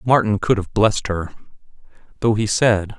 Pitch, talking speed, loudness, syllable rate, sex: 105 Hz, 160 wpm, -19 LUFS, 5.1 syllables/s, male